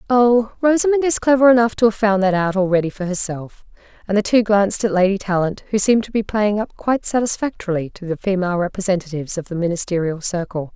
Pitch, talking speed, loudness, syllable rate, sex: 205 Hz, 200 wpm, -18 LUFS, 6.4 syllables/s, female